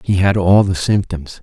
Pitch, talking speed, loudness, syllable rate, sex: 95 Hz, 210 wpm, -14 LUFS, 4.5 syllables/s, male